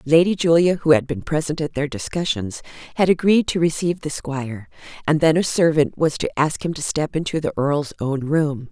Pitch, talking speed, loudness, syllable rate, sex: 155 Hz, 205 wpm, -20 LUFS, 5.4 syllables/s, female